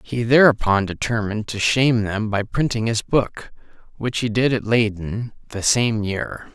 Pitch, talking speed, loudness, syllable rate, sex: 110 Hz, 165 wpm, -20 LUFS, 4.5 syllables/s, male